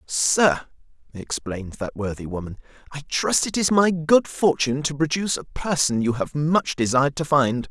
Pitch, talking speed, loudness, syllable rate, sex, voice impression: 140 Hz, 170 wpm, -22 LUFS, 4.9 syllables/s, male, masculine, middle-aged, powerful, intellectual, sincere, slightly calm, wild, slightly strict, slightly sharp